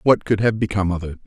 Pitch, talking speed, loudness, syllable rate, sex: 100 Hz, 285 wpm, -20 LUFS, 7.1 syllables/s, male